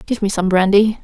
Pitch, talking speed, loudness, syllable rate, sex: 200 Hz, 230 wpm, -15 LUFS, 5.6 syllables/s, female